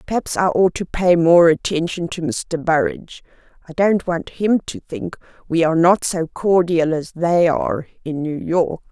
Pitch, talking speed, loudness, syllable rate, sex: 170 Hz, 180 wpm, -18 LUFS, 4.6 syllables/s, female